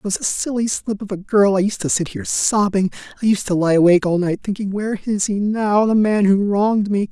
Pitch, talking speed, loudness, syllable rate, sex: 200 Hz, 260 wpm, -18 LUFS, 5.9 syllables/s, male